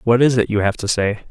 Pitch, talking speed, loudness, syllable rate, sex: 110 Hz, 320 wpm, -17 LUFS, 6.4 syllables/s, male